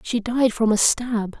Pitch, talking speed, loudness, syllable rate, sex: 225 Hz, 215 wpm, -20 LUFS, 3.9 syllables/s, female